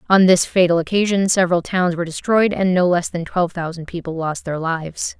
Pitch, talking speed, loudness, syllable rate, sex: 175 Hz, 210 wpm, -18 LUFS, 5.8 syllables/s, female